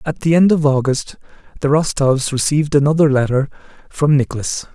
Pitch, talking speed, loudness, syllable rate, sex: 145 Hz, 150 wpm, -16 LUFS, 5.6 syllables/s, male